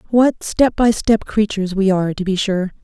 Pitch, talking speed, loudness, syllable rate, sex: 205 Hz, 210 wpm, -17 LUFS, 5.2 syllables/s, female